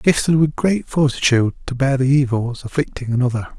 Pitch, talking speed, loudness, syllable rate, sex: 135 Hz, 170 wpm, -18 LUFS, 5.6 syllables/s, male